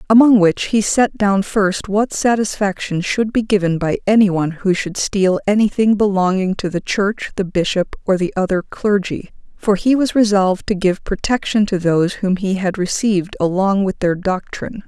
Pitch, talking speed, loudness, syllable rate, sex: 195 Hz, 180 wpm, -17 LUFS, 4.9 syllables/s, female